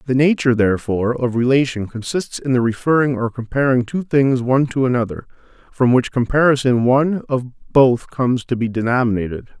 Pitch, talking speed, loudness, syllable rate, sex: 125 Hz, 165 wpm, -17 LUFS, 5.7 syllables/s, male